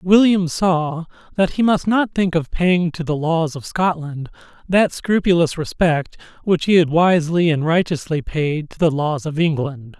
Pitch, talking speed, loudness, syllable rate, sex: 165 Hz, 175 wpm, -18 LUFS, 4.3 syllables/s, male